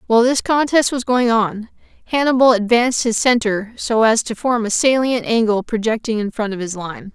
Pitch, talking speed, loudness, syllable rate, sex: 230 Hz, 195 wpm, -17 LUFS, 5.2 syllables/s, female